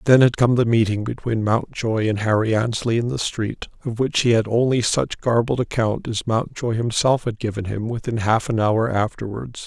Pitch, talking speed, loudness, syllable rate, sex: 115 Hz, 200 wpm, -21 LUFS, 5.1 syllables/s, male